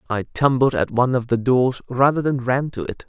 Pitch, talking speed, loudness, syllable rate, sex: 125 Hz, 235 wpm, -20 LUFS, 5.4 syllables/s, male